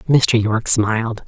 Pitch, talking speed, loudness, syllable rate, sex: 115 Hz, 140 wpm, -16 LUFS, 4.6 syllables/s, female